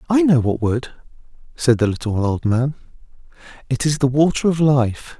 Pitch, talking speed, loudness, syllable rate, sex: 135 Hz, 175 wpm, -18 LUFS, 4.9 syllables/s, male